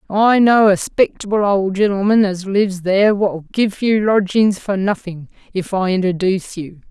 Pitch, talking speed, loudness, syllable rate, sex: 195 Hz, 165 wpm, -16 LUFS, 4.7 syllables/s, female